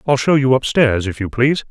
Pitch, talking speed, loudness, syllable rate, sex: 125 Hz, 245 wpm, -16 LUFS, 5.8 syllables/s, male